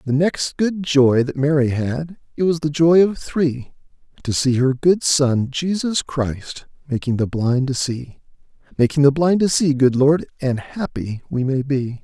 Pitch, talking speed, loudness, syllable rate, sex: 140 Hz, 185 wpm, -19 LUFS, 4.1 syllables/s, male